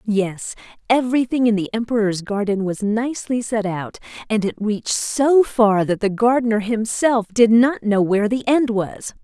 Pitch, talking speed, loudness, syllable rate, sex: 220 Hz, 170 wpm, -19 LUFS, 4.7 syllables/s, female